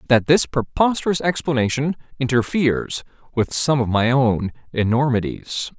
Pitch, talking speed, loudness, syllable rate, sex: 125 Hz, 115 wpm, -20 LUFS, 4.8 syllables/s, male